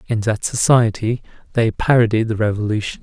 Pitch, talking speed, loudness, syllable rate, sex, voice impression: 110 Hz, 140 wpm, -18 LUFS, 5.5 syllables/s, male, masculine, adult-like, relaxed, slightly weak, slightly soft, slightly muffled, calm, friendly, reassuring, slightly wild, kind, modest